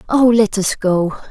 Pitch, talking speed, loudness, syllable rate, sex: 210 Hz, 185 wpm, -15 LUFS, 4.0 syllables/s, female